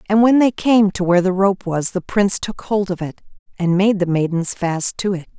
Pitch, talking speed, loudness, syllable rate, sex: 190 Hz, 245 wpm, -18 LUFS, 5.2 syllables/s, female